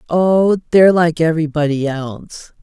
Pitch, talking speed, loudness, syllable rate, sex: 165 Hz, 115 wpm, -14 LUFS, 5.0 syllables/s, female